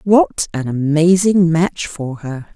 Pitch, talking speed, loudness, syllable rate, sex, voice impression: 165 Hz, 140 wpm, -16 LUFS, 3.4 syllables/s, female, feminine, very gender-neutral, very adult-like, thin, slightly tensed, slightly powerful, bright, soft, clear, fluent, cute, refreshing, sincere, very calm, mature, friendly, reassuring, slightly unique, elegant, slightly wild, sweet, lively, kind, modest, light